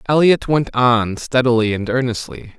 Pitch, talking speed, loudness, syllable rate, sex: 125 Hz, 140 wpm, -17 LUFS, 4.6 syllables/s, male